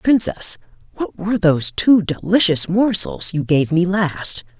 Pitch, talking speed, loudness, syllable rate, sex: 180 Hz, 145 wpm, -17 LUFS, 4.2 syllables/s, female